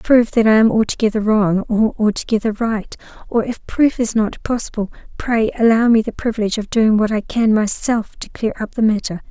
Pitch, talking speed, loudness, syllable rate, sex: 220 Hz, 200 wpm, -17 LUFS, 5.4 syllables/s, female